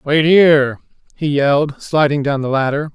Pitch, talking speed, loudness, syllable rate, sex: 145 Hz, 165 wpm, -15 LUFS, 4.8 syllables/s, male